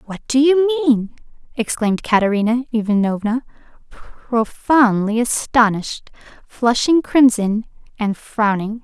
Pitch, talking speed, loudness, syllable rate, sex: 235 Hz, 90 wpm, -17 LUFS, 4.1 syllables/s, female